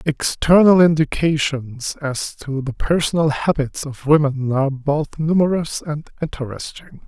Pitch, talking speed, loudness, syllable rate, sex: 145 Hz, 120 wpm, -19 LUFS, 4.3 syllables/s, male